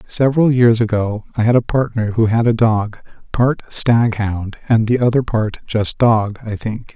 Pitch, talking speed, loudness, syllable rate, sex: 115 Hz, 190 wpm, -16 LUFS, 4.4 syllables/s, male